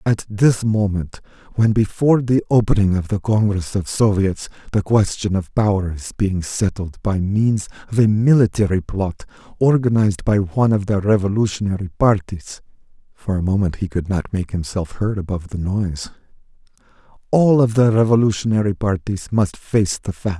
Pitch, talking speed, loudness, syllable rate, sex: 100 Hz, 155 wpm, -18 LUFS, 5.1 syllables/s, male